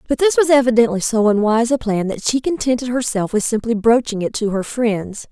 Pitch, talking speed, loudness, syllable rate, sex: 230 Hz, 215 wpm, -17 LUFS, 5.7 syllables/s, female